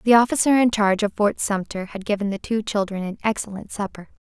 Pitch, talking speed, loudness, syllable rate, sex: 210 Hz, 210 wpm, -22 LUFS, 6.1 syllables/s, female